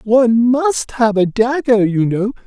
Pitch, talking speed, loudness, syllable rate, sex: 230 Hz, 170 wpm, -15 LUFS, 4.0 syllables/s, male